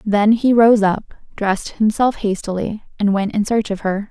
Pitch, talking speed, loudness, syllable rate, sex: 210 Hz, 190 wpm, -17 LUFS, 4.7 syllables/s, female